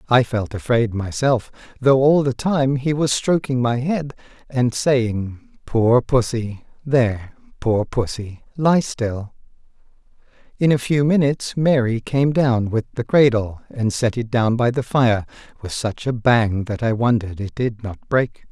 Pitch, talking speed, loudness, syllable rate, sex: 120 Hz, 160 wpm, -19 LUFS, 4.1 syllables/s, male